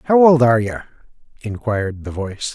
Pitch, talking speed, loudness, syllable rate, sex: 120 Hz, 165 wpm, -17 LUFS, 6.0 syllables/s, male